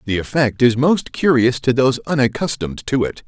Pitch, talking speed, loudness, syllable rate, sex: 130 Hz, 185 wpm, -17 LUFS, 5.7 syllables/s, male